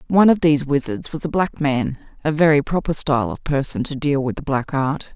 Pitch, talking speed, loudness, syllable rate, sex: 145 Hz, 235 wpm, -20 LUFS, 5.7 syllables/s, female